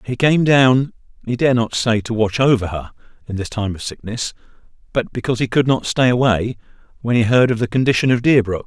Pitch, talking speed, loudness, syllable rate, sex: 115 Hz, 200 wpm, -17 LUFS, 5.8 syllables/s, male